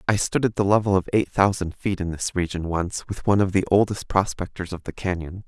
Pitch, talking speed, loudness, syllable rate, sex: 95 Hz, 240 wpm, -23 LUFS, 5.7 syllables/s, male